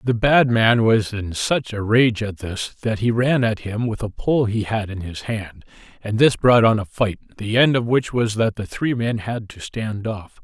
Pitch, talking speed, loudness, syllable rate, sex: 110 Hz, 240 wpm, -20 LUFS, 4.4 syllables/s, male